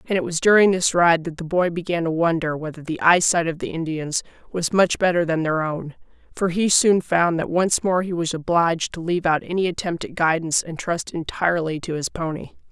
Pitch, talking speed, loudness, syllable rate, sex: 170 Hz, 220 wpm, -21 LUFS, 5.5 syllables/s, female